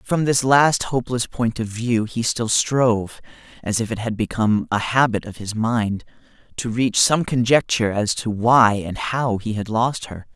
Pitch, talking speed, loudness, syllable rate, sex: 115 Hz, 190 wpm, -20 LUFS, 4.6 syllables/s, male